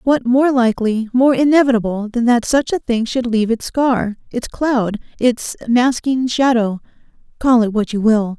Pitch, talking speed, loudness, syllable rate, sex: 240 Hz, 165 wpm, -16 LUFS, 4.6 syllables/s, female